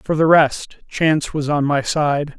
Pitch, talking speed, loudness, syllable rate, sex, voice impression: 150 Hz, 200 wpm, -17 LUFS, 4.0 syllables/s, male, masculine, middle-aged, slightly muffled, slightly refreshing, sincere, slightly calm, slightly kind